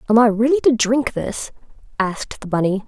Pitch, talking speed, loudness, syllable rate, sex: 230 Hz, 190 wpm, -19 LUFS, 5.4 syllables/s, female